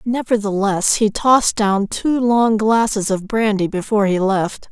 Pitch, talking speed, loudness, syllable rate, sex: 210 Hz, 155 wpm, -17 LUFS, 4.4 syllables/s, female